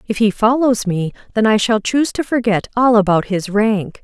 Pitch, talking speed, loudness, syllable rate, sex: 220 Hz, 210 wpm, -16 LUFS, 5.0 syllables/s, female